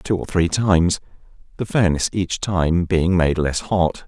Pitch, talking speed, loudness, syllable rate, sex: 90 Hz, 175 wpm, -19 LUFS, 4.4 syllables/s, male